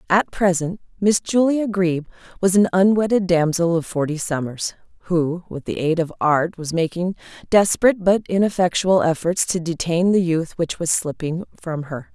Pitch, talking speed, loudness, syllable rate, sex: 175 Hz, 165 wpm, -20 LUFS, 4.8 syllables/s, female